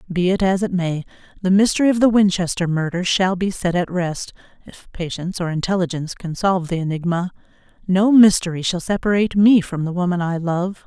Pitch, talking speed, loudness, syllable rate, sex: 180 Hz, 190 wpm, -19 LUFS, 5.8 syllables/s, female